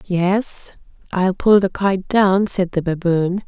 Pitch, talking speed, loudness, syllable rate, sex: 190 Hz, 155 wpm, -18 LUFS, 3.4 syllables/s, female